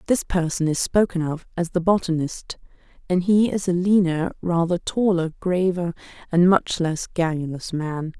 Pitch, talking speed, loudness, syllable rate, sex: 175 Hz, 155 wpm, -22 LUFS, 4.6 syllables/s, female